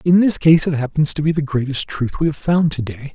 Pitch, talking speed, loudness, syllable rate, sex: 150 Hz, 265 wpm, -17 LUFS, 5.6 syllables/s, male